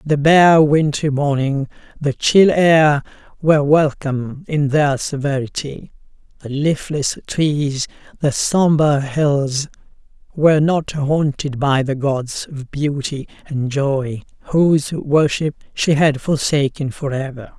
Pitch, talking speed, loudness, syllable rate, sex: 145 Hz, 120 wpm, -17 LUFS, 3.7 syllables/s, male